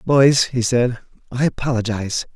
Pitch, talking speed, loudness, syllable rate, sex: 125 Hz, 125 wpm, -18 LUFS, 4.9 syllables/s, male